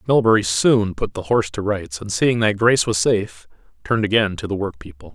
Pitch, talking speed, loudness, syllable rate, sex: 105 Hz, 220 wpm, -19 LUFS, 5.8 syllables/s, male